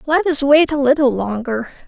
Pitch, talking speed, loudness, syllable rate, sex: 275 Hz, 190 wpm, -16 LUFS, 5.0 syllables/s, female